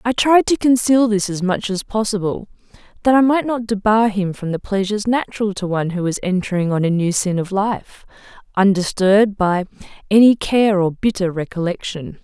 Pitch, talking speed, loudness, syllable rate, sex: 200 Hz, 180 wpm, -17 LUFS, 5.3 syllables/s, female